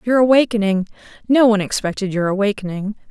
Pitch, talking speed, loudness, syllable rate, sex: 210 Hz, 115 wpm, -17 LUFS, 6.4 syllables/s, female